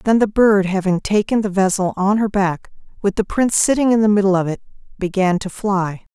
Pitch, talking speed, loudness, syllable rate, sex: 200 Hz, 195 wpm, -17 LUFS, 5.4 syllables/s, female